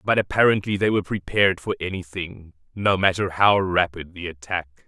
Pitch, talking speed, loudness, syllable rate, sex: 95 Hz, 160 wpm, -22 LUFS, 5.3 syllables/s, male